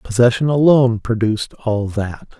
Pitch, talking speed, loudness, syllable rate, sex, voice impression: 115 Hz, 125 wpm, -16 LUFS, 4.8 syllables/s, male, masculine, adult-like, sincere, calm, slightly elegant